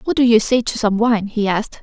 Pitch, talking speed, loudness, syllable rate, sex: 225 Hz, 295 wpm, -16 LUFS, 5.6 syllables/s, female